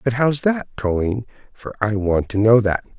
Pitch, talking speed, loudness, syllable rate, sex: 115 Hz, 200 wpm, -19 LUFS, 5.1 syllables/s, male